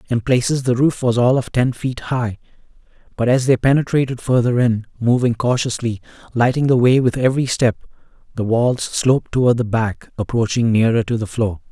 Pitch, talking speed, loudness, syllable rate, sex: 120 Hz, 180 wpm, -18 LUFS, 5.4 syllables/s, male